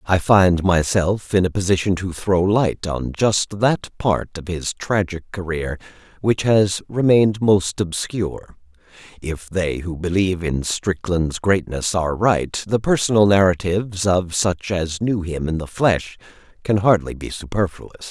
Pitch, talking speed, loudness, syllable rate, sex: 95 Hz, 150 wpm, -20 LUFS, 4.2 syllables/s, male